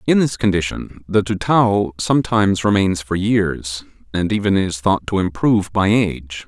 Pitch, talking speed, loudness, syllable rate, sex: 100 Hz, 160 wpm, -18 LUFS, 4.7 syllables/s, male